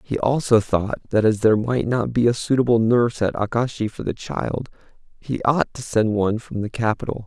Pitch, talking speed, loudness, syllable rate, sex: 115 Hz, 205 wpm, -21 LUFS, 5.4 syllables/s, male